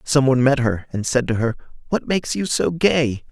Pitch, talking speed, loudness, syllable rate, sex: 135 Hz, 235 wpm, -20 LUFS, 5.4 syllables/s, male